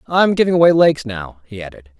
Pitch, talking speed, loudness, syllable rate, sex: 135 Hz, 240 wpm, -14 LUFS, 6.7 syllables/s, male